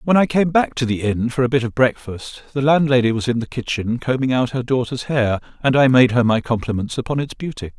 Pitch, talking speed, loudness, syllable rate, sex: 125 Hz, 245 wpm, -18 LUFS, 5.8 syllables/s, male